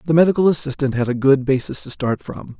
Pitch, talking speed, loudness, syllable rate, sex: 140 Hz, 230 wpm, -18 LUFS, 6.2 syllables/s, male